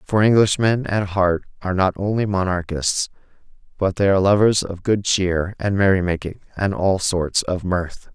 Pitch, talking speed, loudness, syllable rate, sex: 95 Hz, 160 wpm, -20 LUFS, 4.7 syllables/s, male